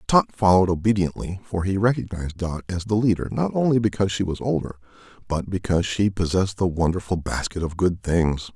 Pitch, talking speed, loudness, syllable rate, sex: 95 Hz, 180 wpm, -23 LUFS, 6.0 syllables/s, male